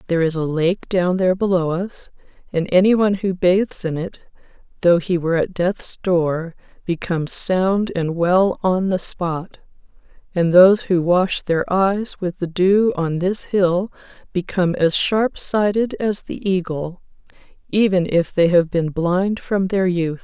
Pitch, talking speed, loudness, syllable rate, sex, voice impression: 180 Hz, 165 wpm, -19 LUFS, 4.1 syllables/s, female, feminine, adult-like, tensed, powerful, bright, slightly hard, clear, intellectual, friendly, reassuring, elegant, lively, slightly sharp